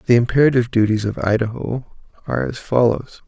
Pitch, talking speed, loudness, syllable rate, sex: 120 Hz, 145 wpm, -19 LUFS, 6.4 syllables/s, male